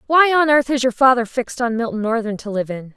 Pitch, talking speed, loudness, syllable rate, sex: 240 Hz, 265 wpm, -18 LUFS, 6.1 syllables/s, female